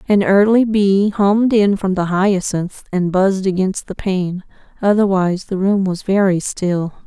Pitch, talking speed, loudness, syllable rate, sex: 195 Hz, 160 wpm, -16 LUFS, 4.4 syllables/s, female